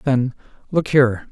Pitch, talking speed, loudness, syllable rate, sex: 130 Hz, 135 wpm, -19 LUFS, 4.9 syllables/s, male